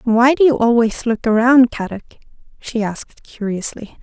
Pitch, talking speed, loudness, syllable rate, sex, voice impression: 230 Hz, 150 wpm, -16 LUFS, 4.9 syllables/s, female, feminine, adult-like, slightly tensed, powerful, slightly soft, slightly raspy, intellectual, calm, slightly friendly, elegant, slightly modest